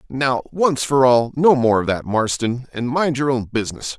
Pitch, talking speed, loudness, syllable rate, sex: 130 Hz, 210 wpm, -18 LUFS, 4.8 syllables/s, male